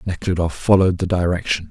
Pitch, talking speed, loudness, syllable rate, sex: 90 Hz, 140 wpm, -19 LUFS, 6.2 syllables/s, male